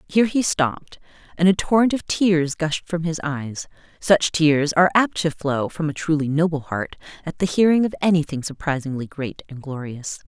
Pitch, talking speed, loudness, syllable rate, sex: 160 Hz, 185 wpm, -21 LUFS, 5.0 syllables/s, female